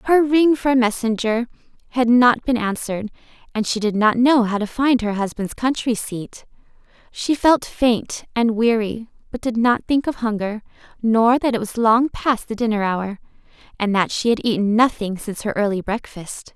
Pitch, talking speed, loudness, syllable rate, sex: 230 Hz, 185 wpm, -19 LUFS, 4.8 syllables/s, female